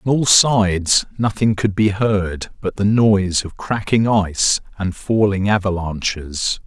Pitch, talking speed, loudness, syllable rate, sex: 100 Hz, 145 wpm, -17 LUFS, 4.1 syllables/s, male